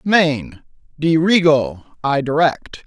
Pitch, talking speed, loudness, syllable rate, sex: 155 Hz, 65 wpm, -17 LUFS, 3.7 syllables/s, male